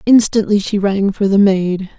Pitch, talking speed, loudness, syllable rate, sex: 200 Hz, 180 wpm, -14 LUFS, 4.4 syllables/s, female